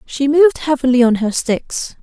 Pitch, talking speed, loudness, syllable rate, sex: 270 Hz, 180 wpm, -15 LUFS, 4.8 syllables/s, female